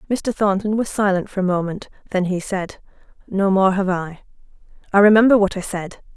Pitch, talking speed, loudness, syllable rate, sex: 195 Hz, 185 wpm, -19 LUFS, 5.4 syllables/s, female